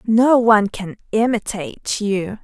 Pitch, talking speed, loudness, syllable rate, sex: 215 Hz, 125 wpm, -18 LUFS, 4.2 syllables/s, female